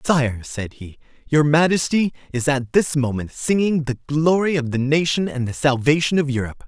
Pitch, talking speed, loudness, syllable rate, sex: 145 Hz, 180 wpm, -20 LUFS, 5.0 syllables/s, male